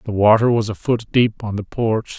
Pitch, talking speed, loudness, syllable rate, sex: 110 Hz, 245 wpm, -18 LUFS, 4.9 syllables/s, male